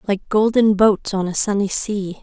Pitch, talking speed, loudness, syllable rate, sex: 205 Hz, 190 wpm, -18 LUFS, 4.4 syllables/s, female